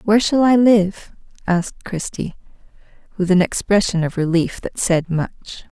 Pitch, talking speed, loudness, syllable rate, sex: 190 Hz, 145 wpm, -18 LUFS, 4.5 syllables/s, female